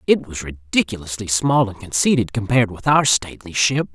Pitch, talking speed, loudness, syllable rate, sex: 110 Hz, 165 wpm, -19 LUFS, 5.6 syllables/s, male